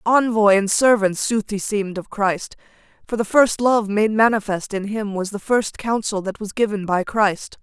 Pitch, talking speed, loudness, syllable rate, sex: 210 Hz, 195 wpm, -19 LUFS, 4.6 syllables/s, female